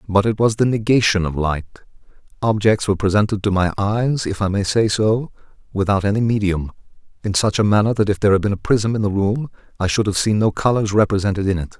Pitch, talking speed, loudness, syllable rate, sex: 105 Hz, 225 wpm, -18 LUFS, 6.2 syllables/s, male